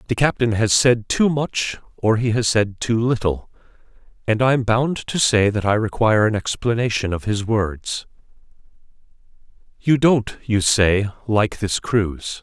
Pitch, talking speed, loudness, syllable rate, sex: 110 Hz, 155 wpm, -19 LUFS, 4.3 syllables/s, male